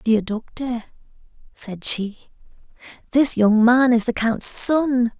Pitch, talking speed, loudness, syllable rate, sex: 235 Hz, 125 wpm, -19 LUFS, 3.3 syllables/s, female